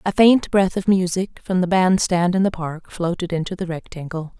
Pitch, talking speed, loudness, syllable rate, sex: 180 Hz, 220 wpm, -20 LUFS, 4.9 syllables/s, female